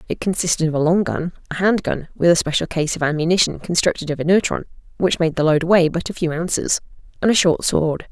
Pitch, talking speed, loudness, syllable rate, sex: 170 Hz, 230 wpm, -19 LUFS, 6.0 syllables/s, female